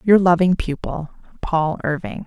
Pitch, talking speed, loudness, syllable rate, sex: 170 Hz, 135 wpm, -20 LUFS, 4.4 syllables/s, female